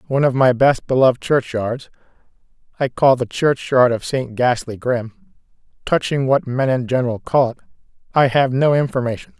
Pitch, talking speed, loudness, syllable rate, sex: 130 Hz, 160 wpm, -18 LUFS, 5.1 syllables/s, male